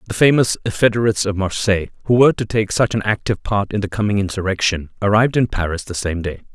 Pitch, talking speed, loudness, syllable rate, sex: 100 Hz, 210 wpm, -18 LUFS, 6.7 syllables/s, male